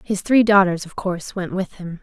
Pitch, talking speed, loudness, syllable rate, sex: 190 Hz, 235 wpm, -19 LUFS, 5.2 syllables/s, female